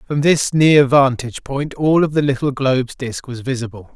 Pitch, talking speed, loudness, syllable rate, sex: 135 Hz, 195 wpm, -17 LUFS, 5.0 syllables/s, male